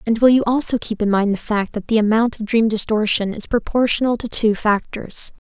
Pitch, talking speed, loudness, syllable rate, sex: 220 Hz, 220 wpm, -18 LUFS, 5.4 syllables/s, female